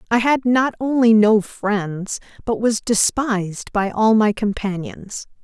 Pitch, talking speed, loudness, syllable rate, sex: 215 Hz, 145 wpm, -19 LUFS, 3.8 syllables/s, female